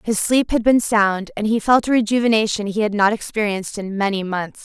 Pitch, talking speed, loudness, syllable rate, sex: 215 Hz, 220 wpm, -18 LUFS, 5.5 syllables/s, female